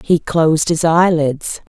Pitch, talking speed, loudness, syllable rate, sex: 160 Hz, 135 wpm, -15 LUFS, 3.9 syllables/s, female